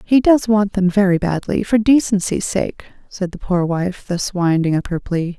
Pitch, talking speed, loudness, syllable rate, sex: 190 Hz, 190 wpm, -17 LUFS, 4.6 syllables/s, female